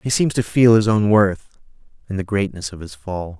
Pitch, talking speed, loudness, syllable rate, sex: 100 Hz, 230 wpm, -18 LUFS, 4.9 syllables/s, male